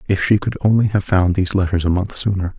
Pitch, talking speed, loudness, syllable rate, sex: 95 Hz, 255 wpm, -17 LUFS, 6.4 syllables/s, male